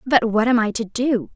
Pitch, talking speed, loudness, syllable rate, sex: 230 Hz, 265 wpm, -19 LUFS, 5.3 syllables/s, female